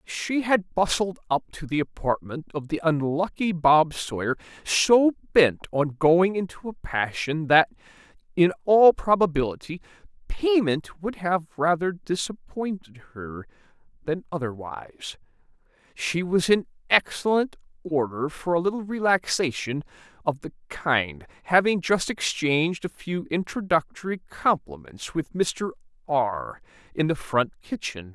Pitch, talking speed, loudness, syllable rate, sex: 165 Hz, 120 wpm, -24 LUFS, 4.2 syllables/s, male